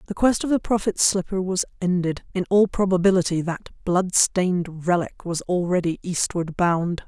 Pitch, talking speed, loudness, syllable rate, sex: 180 Hz, 160 wpm, -22 LUFS, 4.9 syllables/s, female